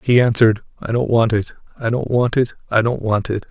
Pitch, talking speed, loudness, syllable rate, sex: 115 Hz, 240 wpm, -18 LUFS, 5.7 syllables/s, male